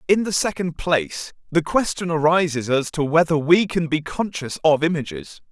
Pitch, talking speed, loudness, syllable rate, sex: 160 Hz, 175 wpm, -20 LUFS, 5.0 syllables/s, male